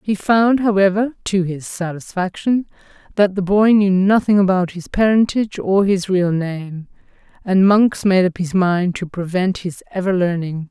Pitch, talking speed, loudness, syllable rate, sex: 190 Hz, 160 wpm, -17 LUFS, 4.5 syllables/s, female